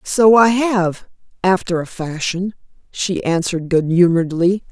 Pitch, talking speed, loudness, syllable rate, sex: 180 Hz, 115 wpm, -17 LUFS, 4.4 syllables/s, female